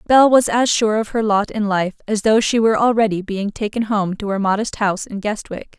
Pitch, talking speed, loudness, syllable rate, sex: 210 Hz, 240 wpm, -18 LUFS, 5.5 syllables/s, female